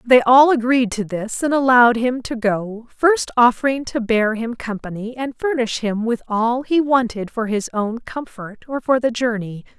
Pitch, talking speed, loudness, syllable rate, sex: 240 Hz, 190 wpm, -18 LUFS, 4.5 syllables/s, female